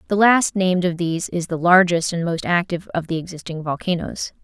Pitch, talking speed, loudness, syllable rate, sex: 175 Hz, 205 wpm, -20 LUFS, 5.8 syllables/s, female